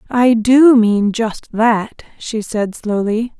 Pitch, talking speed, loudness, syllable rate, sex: 225 Hz, 70 wpm, -14 LUFS, 3.0 syllables/s, female